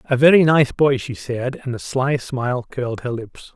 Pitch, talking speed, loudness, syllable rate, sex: 130 Hz, 220 wpm, -19 LUFS, 4.8 syllables/s, male